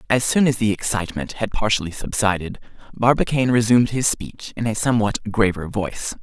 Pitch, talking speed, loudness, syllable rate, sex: 110 Hz, 165 wpm, -20 LUFS, 5.9 syllables/s, male